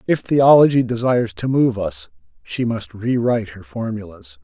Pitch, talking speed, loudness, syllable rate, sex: 110 Hz, 160 wpm, -18 LUFS, 4.8 syllables/s, male